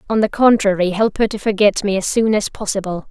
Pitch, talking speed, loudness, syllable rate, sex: 205 Hz, 230 wpm, -16 LUFS, 5.8 syllables/s, female